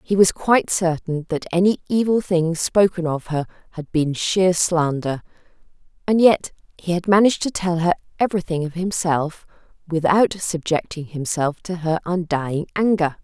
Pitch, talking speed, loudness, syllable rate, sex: 170 Hz, 150 wpm, -20 LUFS, 4.8 syllables/s, female